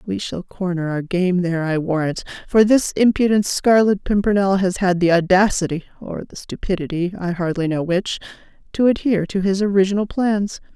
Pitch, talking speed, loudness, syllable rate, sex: 190 Hz, 155 wpm, -19 LUFS, 5.3 syllables/s, female